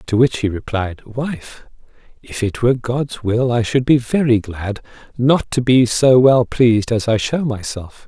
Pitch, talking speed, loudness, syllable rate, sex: 120 Hz, 185 wpm, -17 LUFS, 4.3 syllables/s, male